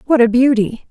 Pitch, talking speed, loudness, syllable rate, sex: 245 Hz, 200 wpm, -13 LUFS, 5.2 syllables/s, female